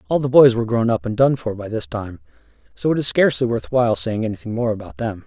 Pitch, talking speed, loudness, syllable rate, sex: 110 Hz, 260 wpm, -19 LUFS, 6.6 syllables/s, male